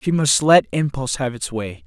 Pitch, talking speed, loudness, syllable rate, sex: 140 Hz, 225 wpm, -18 LUFS, 5.1 syllables/s, male